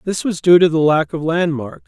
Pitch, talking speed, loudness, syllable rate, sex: 165 Hz, 255 wpm, -15 LUFS, 5.2 syllables/s, male